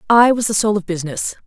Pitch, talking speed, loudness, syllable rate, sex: 205 Hz, 245 wpm, -17 LUFS, 6.7 syllables/s, female